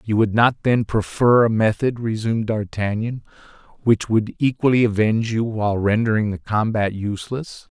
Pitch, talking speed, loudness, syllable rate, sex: 110 Hz, 145 wpm, -20 LUFS, 5.1 syllables/s, male